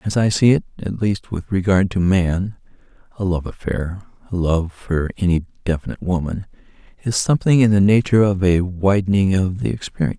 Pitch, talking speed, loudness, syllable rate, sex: 95 Hz, 170 wpm, -19 LUFS, 5.6 syllables/s, male